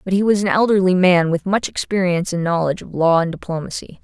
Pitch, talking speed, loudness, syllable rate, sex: 180 Hz, 225 wpm, -18 LUFS, 6.4 syllables/s, female